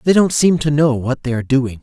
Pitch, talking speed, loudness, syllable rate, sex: 140 Hz, 295 wpm, -16 LUFS, 5.9 syllables/s, male